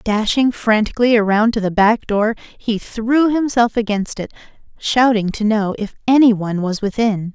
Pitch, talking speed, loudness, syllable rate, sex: 220 Hz, 165 wpm, -16 LUFS, 4.7 syllables/s, female